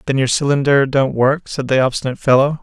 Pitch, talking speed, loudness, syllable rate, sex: 135 Hz, 205 wpm, -16 LUFS, 6.1 syllables/s, male